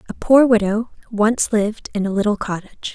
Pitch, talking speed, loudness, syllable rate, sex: 215 Hz, 185 wpm, -18 LUFS, 5.5 syllables/s, female